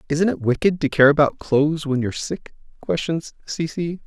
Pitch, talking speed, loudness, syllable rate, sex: 155 Hz, 175 wpm, -20 LUFS, 5.5 syllables/s, male